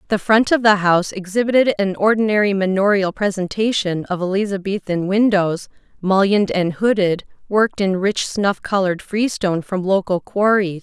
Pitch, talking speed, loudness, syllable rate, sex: 195 Hz, 140 wpm, -18 LUFS, 5.2 syllables/s, female